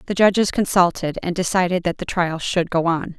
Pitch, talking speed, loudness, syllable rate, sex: 180 Hz, 205 wpm, -20 LUFS, 5.3 syllables/s, female